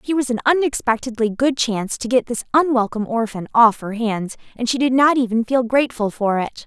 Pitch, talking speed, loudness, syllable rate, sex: 240 Hz, 205 wpm, -19 LUFS, 5.8 syllables/s, female